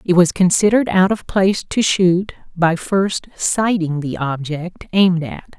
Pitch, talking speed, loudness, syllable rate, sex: 180 Hz, 160 wpm, -17 LUFS, 4.3 syllables/s, female